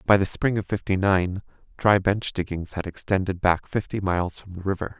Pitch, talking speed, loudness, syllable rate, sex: 95 Hz, 205 wpm, -24 LUFS, 5.3 syllables/s, male